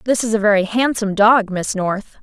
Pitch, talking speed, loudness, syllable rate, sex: 210 Hz, 215 wpm, -16 LUFS, 5.4 syllables/s, female